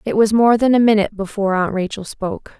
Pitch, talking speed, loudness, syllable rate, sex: 210 Hz, 230 wpm, -17 LUFS, 6.5 syllables/s, female